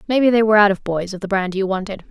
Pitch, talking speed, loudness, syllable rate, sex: 200 Hz, 315 wpm, -17 LUFS, 7.3 syllables/s, female